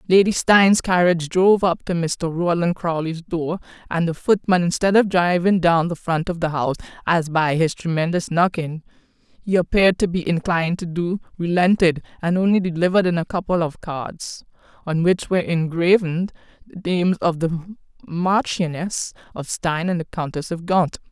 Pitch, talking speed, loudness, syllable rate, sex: 175 Hz, 170 wpm, -20 LUFS, 5.2 syllables/s, female